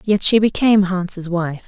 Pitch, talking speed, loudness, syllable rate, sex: 190 Hz, 180 wpm, -17 LUFS, 4.5 syllables/s, female